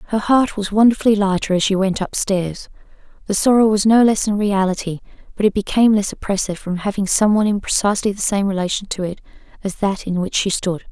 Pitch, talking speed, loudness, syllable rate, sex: 200 Hz, 215 wpm, -18 LUFS, 6.1 syllables/s, female